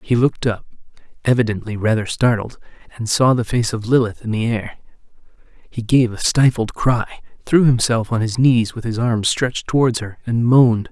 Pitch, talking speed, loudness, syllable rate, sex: 115 Hz, 180 wpm, -18 LUFS, 5.2 syllables/s, male